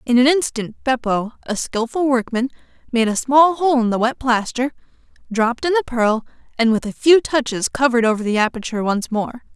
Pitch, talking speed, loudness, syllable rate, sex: 245 Hz, 190 wpm, -18 LUFS, 5.5 syllables/s, female